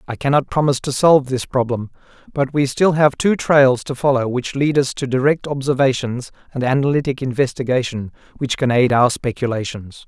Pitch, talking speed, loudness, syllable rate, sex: 130 Hz, 175 wpm, -18 LUFS, 5.4 syllables/s, male